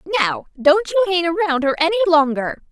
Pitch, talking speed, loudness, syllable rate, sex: 335 Hz, 175 wpm, -17 LUFS, 6.5 syllables/s, female